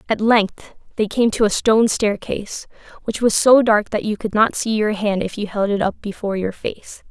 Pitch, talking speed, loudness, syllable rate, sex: 210 Hz, 230 wpm, -18 LUFS, 5.1 syllables/s, female